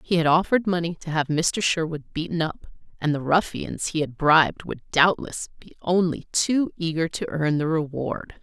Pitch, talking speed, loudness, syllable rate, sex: 165 Hz, 185 wpm, -23 LUFS, 4.9 syllables/s, female